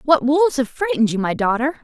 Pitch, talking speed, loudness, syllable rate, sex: 265 Hz, 230 wpm, -18 LUFS, 6.6 syllables/s, female